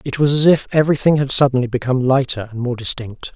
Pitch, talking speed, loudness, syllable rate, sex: 130 Hz, 215 wpm, -16 LUFS, 6.5 syllables/s, male